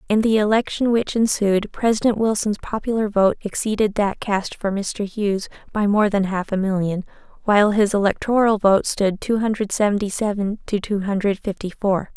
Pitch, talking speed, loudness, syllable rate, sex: 205 Hz, 175 wpm, -20 LUFS, 5.1 syllables/s, female